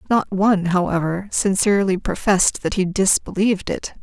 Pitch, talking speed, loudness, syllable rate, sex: 190 Hz, 135 wpm, -19 LUFS, 5.3 syllables/s, female